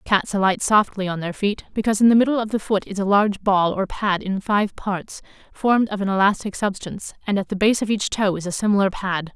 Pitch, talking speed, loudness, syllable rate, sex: 200 Hz, 245 wpm, -21 LUFS, 5.9 syllables/s, female